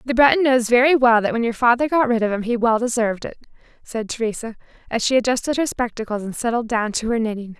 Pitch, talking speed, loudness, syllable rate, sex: 235 Hz, 235 wpm, -19 LUFS, 6.4 syllables/s, female